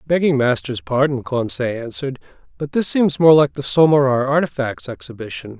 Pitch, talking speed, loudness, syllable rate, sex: 140 Hz, 150 wpm, -18 LUFS, 5.3 syllables/s, male